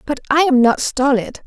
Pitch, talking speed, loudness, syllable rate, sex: 270 Hz, 205 wpm, -15 LUFS, 5.1 syllables/s, female